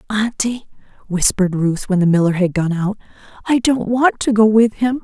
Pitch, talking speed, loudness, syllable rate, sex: 210 Hz, 200 wpm, -16 LUFS, 5.3 syllables/s, female